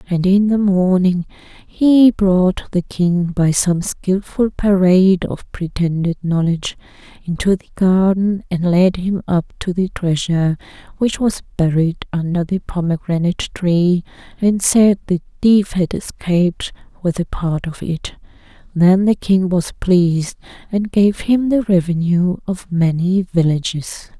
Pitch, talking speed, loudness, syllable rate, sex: 180 Hz, 140 wpm, -16 LUFS, 4.0 syllables/s, female